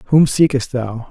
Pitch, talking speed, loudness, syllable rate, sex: 130 Hz, 165 wpm, -16 LUFS, 3.8 syllables/s, male